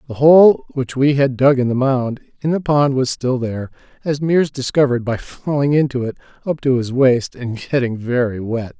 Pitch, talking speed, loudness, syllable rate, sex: 130 Hz, 205 wpm, -17 LUFS, 5.2 syllables/s, male